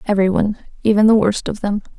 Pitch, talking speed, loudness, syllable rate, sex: 205 Hz, 180 wpm, -17 LUFS, 7.5 syllables/s, female